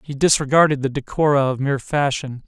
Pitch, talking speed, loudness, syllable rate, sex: 140 Hz, 170 wpm, -19 LUFS, 6.0 syllables/s, male